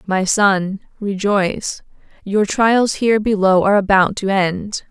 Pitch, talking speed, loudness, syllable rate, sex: 200 Hz, 135 wpm, -16 LUFS, 4.1 syllables/s, female